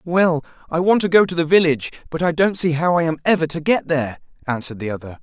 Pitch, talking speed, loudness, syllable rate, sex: 160 Hz, 255 wpm, -19 LUFS, 6.7 syllables/s, male